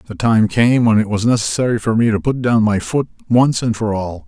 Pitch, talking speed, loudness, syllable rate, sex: 110 Hz, 255 wpm, -16 LUFS, 5.4 syllables/s, male